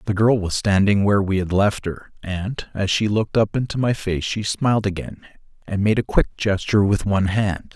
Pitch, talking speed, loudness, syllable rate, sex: 100 Hz, 215 wpm, -20 LUFS, 5.3 syllables/s, male